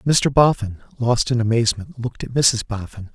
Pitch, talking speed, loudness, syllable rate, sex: 120 Hz, 170 wpm, -19 LUFS, 5.2 syllables/s, male